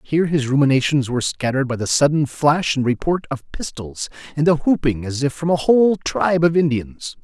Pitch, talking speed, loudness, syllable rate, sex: 140 Hz, 200 wpm, -19 LUFS, 5.6 syllables/s, male